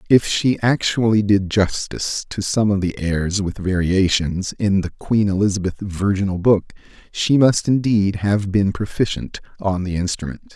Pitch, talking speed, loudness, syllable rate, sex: 100 Hz, 155 wpm, -19 LUFS, 4.4 syllables/s, male